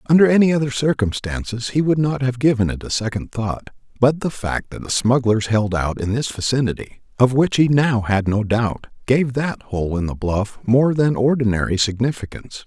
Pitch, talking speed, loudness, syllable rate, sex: 120 Hz, 185 wpm, -19 LUFS, 5.1 syllables/s, male